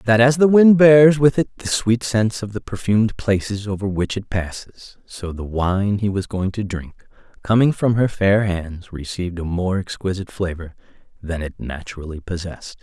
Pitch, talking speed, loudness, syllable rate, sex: 105 Hz, 185 wpm, -19 LUFS, 4.9 syllables/s, male